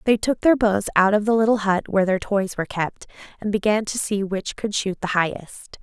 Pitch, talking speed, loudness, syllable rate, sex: 205 Hz, 235 wpm, -21 LUFS, 5.6 syllables/s, female